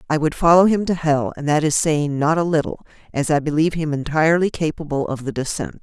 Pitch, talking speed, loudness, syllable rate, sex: 155 Hz, 225 wpm, -19 LUFS, 6.0 syllables/s, female